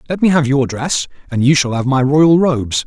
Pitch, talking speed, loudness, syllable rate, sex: 140 Hz, 250 wpm, -14 LUFS, 5.2 syllables/s, male